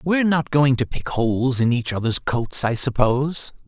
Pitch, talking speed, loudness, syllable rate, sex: 130 Hz, 195 wpm, -20 LUFS, 4.9 syllables/s, male